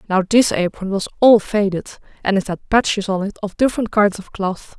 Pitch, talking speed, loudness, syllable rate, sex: 200 Hz, 215 wpm, -18 LUFS, 5.4 syllables/s, female